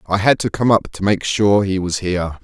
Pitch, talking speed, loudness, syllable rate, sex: 100 Hz, 270 wpm, -17 LUFS, 5.4 syllables/s, male